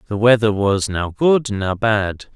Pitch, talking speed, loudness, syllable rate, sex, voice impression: 105 Hz, 180 wpm, -17 LUFS, 3.8 syllables/s, male, very masculine, adult-like, slightly middle-aged, thick, slightly relaxed, slightly weak, slightly bright, soft, muffled, slightly fluent, cool, very intellectual, sincere, very calm, very mature, friendly, very reassuring, very unique, elegant, wild, slightly sweet, lively, very kind, slightly modest